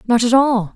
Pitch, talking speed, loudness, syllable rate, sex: 235 Hz, 240 wpm, -15 LUFS, 5.1 syllables/s, female